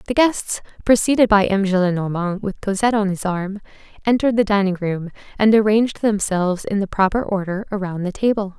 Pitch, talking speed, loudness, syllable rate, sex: 205 Hz, 175 wpm, -19 LUFS, 5.8 syllables/s, female